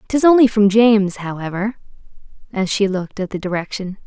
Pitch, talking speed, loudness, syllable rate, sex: 205 Hz, 160 wpm, -17 LUFS, 5.8 syllables/s, female